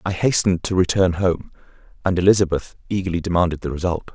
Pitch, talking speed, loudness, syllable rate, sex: 90 Hz, 160 wpm, -20 LUFS, 6.5 syllables/s, male